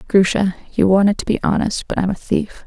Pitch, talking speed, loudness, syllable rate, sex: 195 Hz, 225 wpm, -18 LUFS, 5.7 syllables/s, female